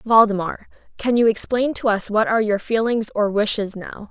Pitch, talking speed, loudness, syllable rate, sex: 215 Hz, 190 wpm, -20 LUFS, 5.0 syllables/s, female